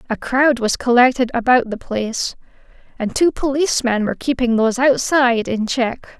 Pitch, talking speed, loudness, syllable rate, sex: 245 Hz, 155 wpm, -17 LUFS, 5.4 syllables/s, female